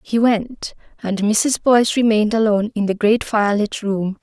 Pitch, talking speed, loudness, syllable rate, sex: 215 Hz, 185 wpm, -17 LUFS, 4.8 syllables/s, female